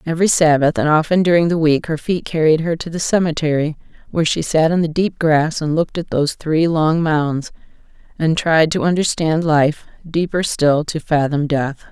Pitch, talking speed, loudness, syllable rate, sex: 160 Hz, 190 wpm, -17 LUFS, 5.1 syllables/s, female